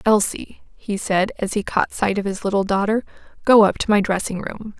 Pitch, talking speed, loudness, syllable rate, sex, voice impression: 205 Hz, 215 wpm, -20 LUFS, 5.2 syllables/s, female, feminine, adult-like, tensed, bright, soft, clear, fluent, intellectual, calm, friendly, reassuring, elegant, lively, slightly kind